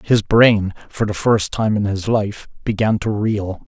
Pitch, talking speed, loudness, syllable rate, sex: 105 Hz, 190 wpm, -18 LUFS, 4.0 syllables/s, male